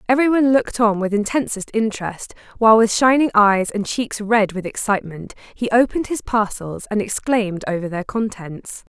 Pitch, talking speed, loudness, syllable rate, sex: 215 Hz, 170 wpm, -19 LUFS, 5.5 syllables/s, female